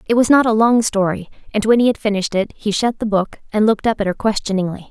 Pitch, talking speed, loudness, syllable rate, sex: 210 Hz, 270 wpm, -17 LUFS, 6.7 syllables/s, female